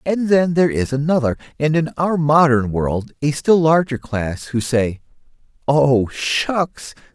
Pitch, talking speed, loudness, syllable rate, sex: 145 Hz, 150 wpm, -18 LUFS, 3.9 syllables/s, male